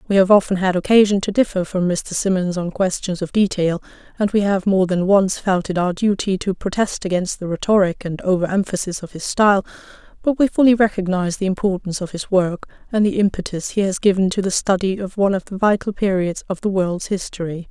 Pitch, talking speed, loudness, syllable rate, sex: 190 Hz, 215 wpm, -19 LUFS, 5.8 syllables/s, female